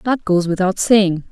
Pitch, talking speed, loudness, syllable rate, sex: 195 Hz, 180 wpm, -16 LUFS, 4.4 syllables/s, female